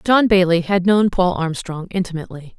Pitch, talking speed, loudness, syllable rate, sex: 185 Hz, 165 wpm, -17 LUFS, 5.3 syllables/s, female